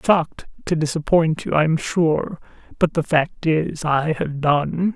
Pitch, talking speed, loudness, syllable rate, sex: 160 Hz, 170 wpm, -20 LUFS, 4.0 syllables/s, female